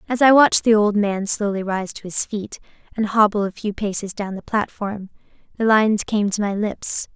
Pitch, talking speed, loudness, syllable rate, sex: 205 Hz, 210 wpm, -20 LUFS, 5.1 syllables/s, female